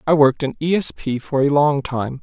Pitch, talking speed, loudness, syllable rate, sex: 145 Hz, 270 wpm, -18 LUFS, 5.4 syllables/s, male